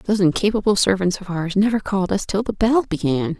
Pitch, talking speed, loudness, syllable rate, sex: 195 Hz, 210 wpm, -20 LUFS, 6.0 syllables/s, female